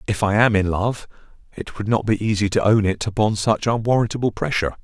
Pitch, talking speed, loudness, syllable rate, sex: 105 Hz, 210 wpm, -20 LUFS, 6.0 syllables/s, male